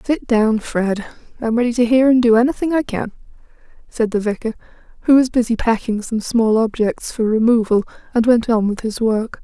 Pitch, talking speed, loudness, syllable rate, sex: 230 Hz, 190 wpm, -17 LUFS, 5.3 syllables/s, female